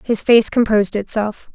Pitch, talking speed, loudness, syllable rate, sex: 220 Hz, 155 wpm, -16 LUFS, 4.9 syllables/s, female